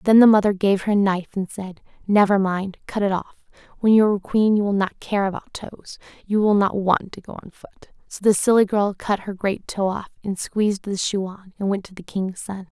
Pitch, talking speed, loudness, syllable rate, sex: 195 Hz, 245 wpm, -21 LUFS, 5.4 syllables/s, female